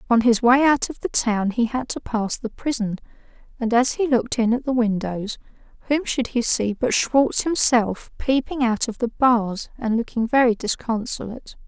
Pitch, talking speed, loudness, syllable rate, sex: 240 Hz, 190 wpm, -21 LUFS, 4.7 syllables/s, female